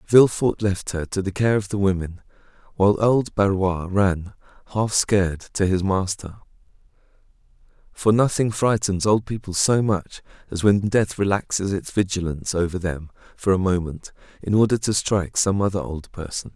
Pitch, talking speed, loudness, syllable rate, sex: 100 Hz, 160 wpm, -22 LUFS, 5.0 syllables/s, male